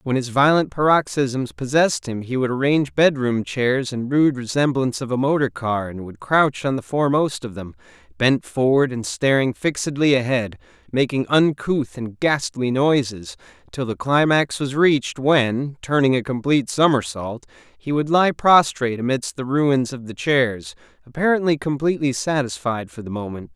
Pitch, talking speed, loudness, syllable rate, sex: 130 Hz, 160 wpm, -20 LUFS, 4.9 syllables/s, male